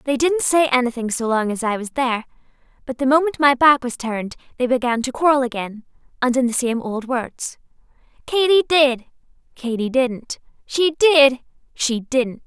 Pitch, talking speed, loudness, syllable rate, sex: 260 Hz, 170 wpm, -19 LUFS, 4.9 syllables/s, female